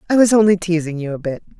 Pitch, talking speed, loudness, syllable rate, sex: 180 Hz, 265 wpm, -17 LUFS, 7.1 syllables/s, female